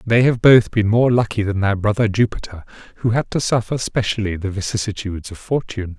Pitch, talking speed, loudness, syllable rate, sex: 105 Hz, 190 wpm, -18 LUFS, 5.8 syllables/s, male